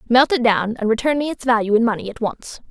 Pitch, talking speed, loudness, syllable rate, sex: 235 Hz, 265 wpm, -18 LUFS, 6.1 syllables/s, female